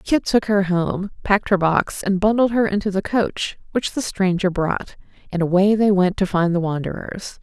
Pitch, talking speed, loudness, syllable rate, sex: 195 Hz, 200 wpm, -20 LUFS, 4.8 syllables/s, female